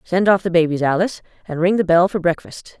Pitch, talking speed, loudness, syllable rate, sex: 175 Hz, 235 wpm, -17 LUFS, 6.1 syllables/s, female